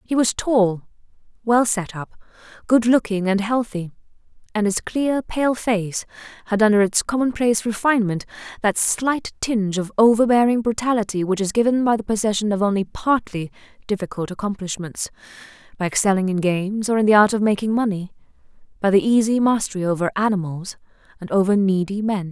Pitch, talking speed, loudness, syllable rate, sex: 210 Hz, 155 wpm, -20 LUFS, 5.6 syllables/s, female